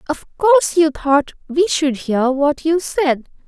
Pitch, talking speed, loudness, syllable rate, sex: 305 Hz, 175 wpm, -17 LUFS, 3.7 syllables/s, female